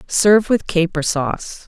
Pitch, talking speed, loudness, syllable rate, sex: 180 Hz, 145 wpm, -17 LUFS, 4.6 syllables/s, female